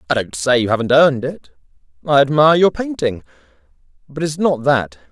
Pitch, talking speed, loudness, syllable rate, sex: 135 Hz, 175 wpm, -16 LUFS, 5.8 syllables/s, male